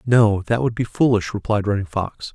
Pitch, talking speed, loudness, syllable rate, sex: 110 Hz, 205 wpm, -20 LUFS, 4.9 syllables/s, male